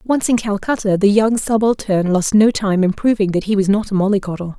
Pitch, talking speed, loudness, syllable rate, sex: 205 Hz, 225 wpm, -16 LUFS, 5.6 syllables/s, female